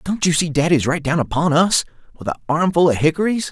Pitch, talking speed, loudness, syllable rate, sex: 165 Hz, 220 wpm, -18 LUFS, 6.0 syllables/s, male